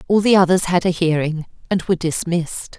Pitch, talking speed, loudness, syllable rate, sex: 175 Hz, 195 wpm, -18 LUFS, 5.8 syllables/s, female